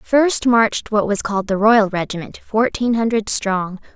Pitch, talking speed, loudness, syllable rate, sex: 215 Hz, 165 wpm, -17 LUFS, 4.5 syllables/s, female